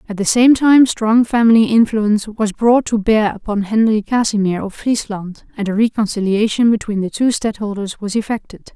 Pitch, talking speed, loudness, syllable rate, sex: 215 Hz, 170 wpm, -15 LUFS, 5.1 syllables/s, female